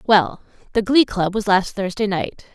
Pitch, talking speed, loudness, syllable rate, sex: 200 Hz, 165 wpm, -19 LUFS, 4.4 syllables/s, female